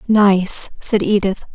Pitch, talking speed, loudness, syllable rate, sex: 200 Hz, 115 wpm, -16 LUFS, 3.3 syllables/s, female